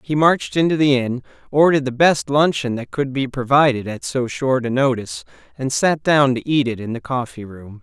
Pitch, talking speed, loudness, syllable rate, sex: 130 Hz, 215 wpm, -18 LUFS, 5.4 syllables/s, male